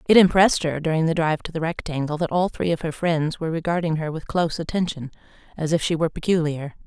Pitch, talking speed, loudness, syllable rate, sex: 165 Hz, 225 wpm, -22 LUFS, 6.7 syllables/s, female